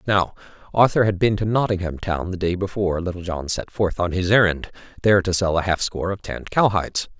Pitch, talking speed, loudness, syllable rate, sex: 95 Hz, 210 wpm, -21 LUFS, 6.1 syllables/s, male